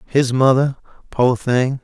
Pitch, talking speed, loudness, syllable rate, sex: 130 Hz, 130 wpm, -17 LUFS, 3.6 syllables/s, male